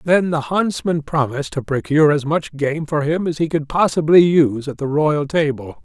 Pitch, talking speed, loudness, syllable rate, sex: 150 Hz, 205 wpm, -18 LUFS, 5.1 syllables/s, male